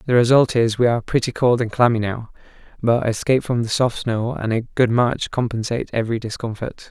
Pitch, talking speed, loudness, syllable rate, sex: 120 Hz, 200 wpm, -20 LUFS, 5.8 syllables/s, male